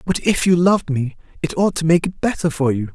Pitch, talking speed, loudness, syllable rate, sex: 165 Hz, 265 wpm, -18 LUFS, 5.9 syllables/s, male